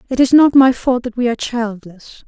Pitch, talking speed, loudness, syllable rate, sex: 240 Hz, 240 wpm, -14 LUFS, 5.4 syllables/s, female